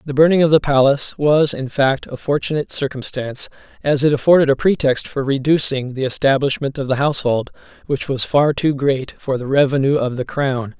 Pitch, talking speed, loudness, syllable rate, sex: 140 Hz, 190 wpm, -17 LUFS, 5.5 syllables/s, male